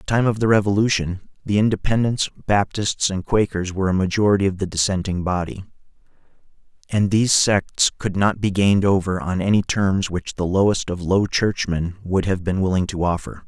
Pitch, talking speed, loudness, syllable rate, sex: 95 Hz, 185 wpm, -20 LUFS, 5.5 syllables/s, male